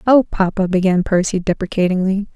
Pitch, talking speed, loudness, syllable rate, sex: 190 Hz, 125 wpm, -17 LUFS, 5.6 syllables/s, female